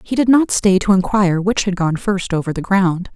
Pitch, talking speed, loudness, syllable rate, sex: 190 Hz, 245 wpm, -16 LUFS, 5.3 syllables/s, female